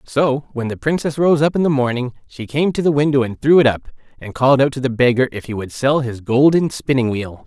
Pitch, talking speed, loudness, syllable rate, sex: 135 Hz, 255 wpm, -17 LUFS, 5.7 syllables/s, male